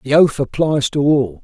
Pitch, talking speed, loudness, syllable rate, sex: 135 Hz, 210 wpm, -16 LUFS, 4.6 syllables/s, male